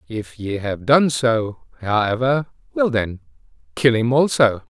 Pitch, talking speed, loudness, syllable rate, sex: 120 Hz, 140 wpm, -19 LUFS, 3.9 syllables/s, male